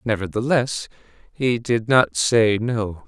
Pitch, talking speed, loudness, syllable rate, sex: 115 Hz, 115 wpm, -20 LUFS, 3.6 syllables/s, male